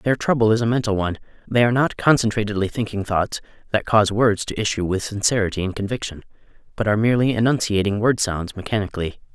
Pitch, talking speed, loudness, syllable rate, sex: 105 Hz, 175 wpm, -21 LUFS, 6.7 syllables/s, male